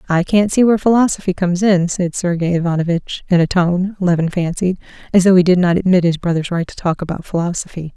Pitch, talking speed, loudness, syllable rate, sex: 180 Hz, 210 wpm, -16 LUFS, 6.1 syllables/s, female